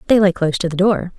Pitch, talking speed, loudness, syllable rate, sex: 180 Hz, 305 wpm, -16 LUFS, 7.3 syllables/s, female